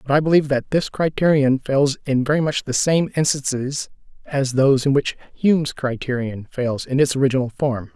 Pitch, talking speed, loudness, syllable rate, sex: 135 Hz, 180 wpm, -20 LUFS, 5.4 syllables/s, male